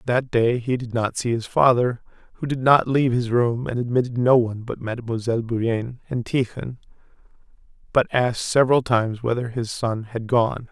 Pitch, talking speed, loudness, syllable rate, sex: 120 Hz, 180 wpm, -22 LUFS, 5.5 syllables/s, male